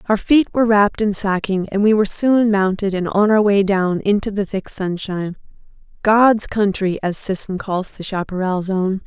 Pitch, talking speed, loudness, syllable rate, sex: 200 Hz, 180 wpm, -18 LUFS, 4.9 syllables/s, female